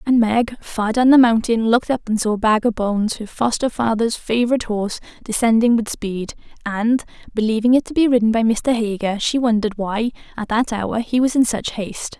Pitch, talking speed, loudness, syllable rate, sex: 225 Hz, 195 wpm, -18 LUFS, 5.4 syllables/s, female